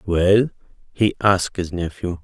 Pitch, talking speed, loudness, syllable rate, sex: 95 Hz, 135 wpm, -20 LUFS, 4.3 syllables/s, male